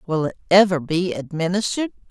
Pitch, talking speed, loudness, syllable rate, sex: 180 Hz, 145 wpm, -20 LUFS, 5.6 syllables/s, female